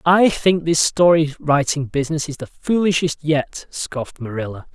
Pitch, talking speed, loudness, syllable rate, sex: 155 Hz, 150 wpm, -19 LUFS, 4.8 syllables/s, male